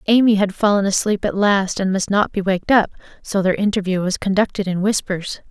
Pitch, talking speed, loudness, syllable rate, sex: 195 Hz, 205 wpm, -18 LUFS, 5.6 syllables/s, female